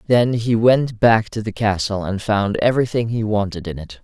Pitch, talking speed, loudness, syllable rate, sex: 110 Hz, 210 wpm, -18 LUFS, 4.9 syllables/s, male